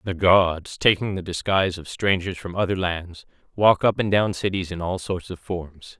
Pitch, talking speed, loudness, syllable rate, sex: 90 Hz, 200 wpm, -22 LUFS, 4.7 syllables/s, male